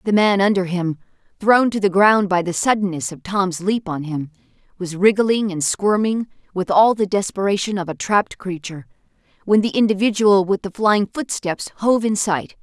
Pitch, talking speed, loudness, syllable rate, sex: 195 Hz, 180 wpm, -19 LUFS, 5.0 syllables/s, female